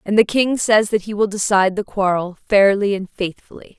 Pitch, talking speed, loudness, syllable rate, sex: 200 Hz, 205 wpm, -17 LUFS, 5.2 syllables/s, female